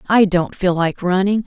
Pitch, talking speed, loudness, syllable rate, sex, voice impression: 190 Hz, 205 wpm, -17 LUFS, 4.7 syllables/s, female, feminine, very adult-like, calm, elegant